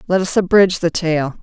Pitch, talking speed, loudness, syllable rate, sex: 175 Hz, 210 wpm, -16 LUFS, 5.6 syllables/s, female